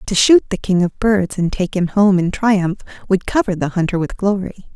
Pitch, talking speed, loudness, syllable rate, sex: 190 Hz, 225 wpm, -16 LUFS, 5.1 syllables/s, female